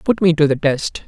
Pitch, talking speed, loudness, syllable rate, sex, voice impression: 150 Hz, 280 wpm, -16 LUFS, 5.2 syllables/s, male, masculine, very adult-like, middle-aged, thick, slightly tensed, slightly weak, slightly bright, hard, clear, fluent, slightly cool, very intellectual, sincere, calm, slightly mature, slightly friendly, unique, slightly wild, slightly kind, modest